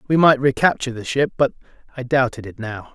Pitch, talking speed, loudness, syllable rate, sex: 130 Hz, 205 wpm, -19 LUFS, 6.1 syllables/s, male